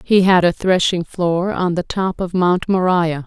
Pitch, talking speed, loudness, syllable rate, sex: 180 Hz, 200 wpm, -17 LUFS, 4.1 syllables/s, female